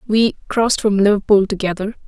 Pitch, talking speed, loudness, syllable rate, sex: 205 Hz, 145 wpm, -16 LUFS, 5.9 syllables/s, female